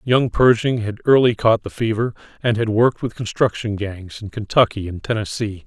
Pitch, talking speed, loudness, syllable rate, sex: 110 Hz, 180 wpm, -19 LUFS, 5.2 syllables/s, male